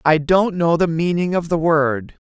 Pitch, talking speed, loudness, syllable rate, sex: 170 Hz, 210 wpm, -18 LUFS, 4.3 syllables/s, female